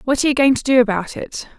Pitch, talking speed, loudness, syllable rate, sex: 255 Hz, 300 wpm, -16 LUFS, 7.1 syllables/s, female